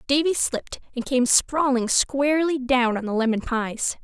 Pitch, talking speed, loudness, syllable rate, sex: 260 Hz, 165 wpm, -22 LUFS, 4.6 syllables/s, female